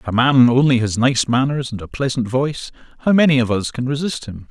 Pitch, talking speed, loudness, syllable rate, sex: 130 Hz, 240 wpm, -17 LUFS, 5.8 syllables/s, male